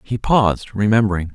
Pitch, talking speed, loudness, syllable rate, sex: 105 Hz, 135 wpm, -17 LUFS, 5.6 syllables/s, male